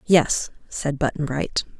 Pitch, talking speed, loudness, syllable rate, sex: 145 Hz, 135 wpm, -23 LUFS, 3.6 syllables/s, female